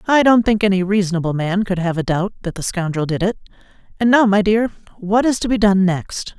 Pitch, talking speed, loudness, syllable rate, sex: 200 Hz, 235 wpm, -17 LUFS, 5.8 syllables/s, female